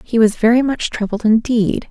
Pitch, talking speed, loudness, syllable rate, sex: 225 Hz, 190 wpm, -16 LUFS, 5.0 syllables/s, female